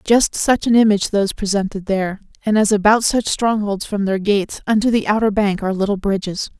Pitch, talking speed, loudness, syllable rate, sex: 205 Hz, 200 wpm, -17 LUFS, 5.9 syllables/s, female